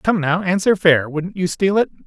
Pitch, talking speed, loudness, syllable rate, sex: 180 Hz, 205 wpm, -17 LUFS, 4.8 syllables/s, male